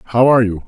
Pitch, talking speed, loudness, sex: 115 Hz, 265 wpm, -13 LUFS, male